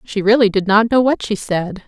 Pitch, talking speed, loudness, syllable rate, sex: 210 Hz, 255 wpm, -15 LUFS, 5.1 syllables/s, female